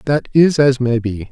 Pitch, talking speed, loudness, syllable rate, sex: 130 Hz, 230 wpm, -15 LUFS, 4.4 syllables/s, male